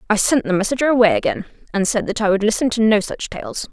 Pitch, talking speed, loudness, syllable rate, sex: 215 Hz, 260 wpm, -18 LUFS, 6.4 syllables/s, female